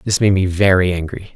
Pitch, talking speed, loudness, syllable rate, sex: 95 Hz, 220 wpm, -15 LUFS, 5.7 syllables/s, male